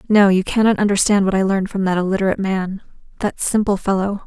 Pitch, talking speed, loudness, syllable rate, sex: 195 Hz, 185 wpm, -18 LUFS, 6.3 syllables/s, female